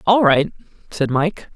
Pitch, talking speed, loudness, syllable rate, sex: 165 Hz, 155 wpm, -18 LUFS, 3.9 syllables/s, female